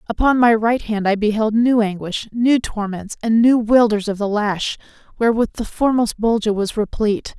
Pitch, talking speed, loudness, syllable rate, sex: 220 Hz, 180 wpm, -18 LUFS, 5.2 syllables/s, female